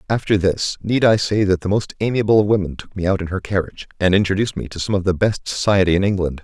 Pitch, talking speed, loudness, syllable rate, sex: 95 Hz, 260 wpm, -19 LUFS, 6.6 syllables/s, male